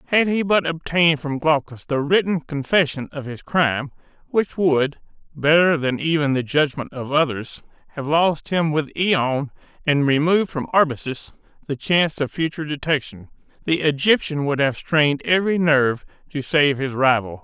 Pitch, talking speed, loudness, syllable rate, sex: 150 Hz, 160 wpm, -20 LUFS, 5.0 syllables/s, male